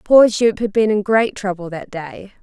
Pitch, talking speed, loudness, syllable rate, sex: 210 Hz, 225 wpm, -17 LUFS, 4.4 syllables/s, female